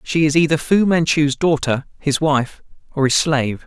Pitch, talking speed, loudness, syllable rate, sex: 150 Hz, 180 wpm, -17 LUFS, 4.8 syllables/s, male